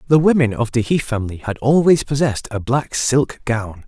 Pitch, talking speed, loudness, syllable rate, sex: 125 Hz, 200 wpm, -18 LUFS, 5.3 syllables/s, male